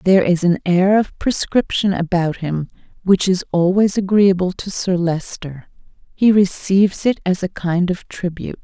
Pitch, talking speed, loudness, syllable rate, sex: 185 Hz, 160 wpm, -17 LUFS, 4.8 syllables/s, female